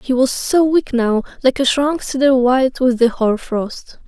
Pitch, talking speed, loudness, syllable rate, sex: 255 Hz, 205 wpm, -16 LUFS, 4.3 syllables/s, female